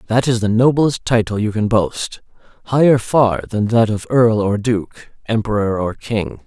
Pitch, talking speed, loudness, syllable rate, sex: 110 Hz, 175 wpm, -17 LUFS, 4.4 syllables/s, male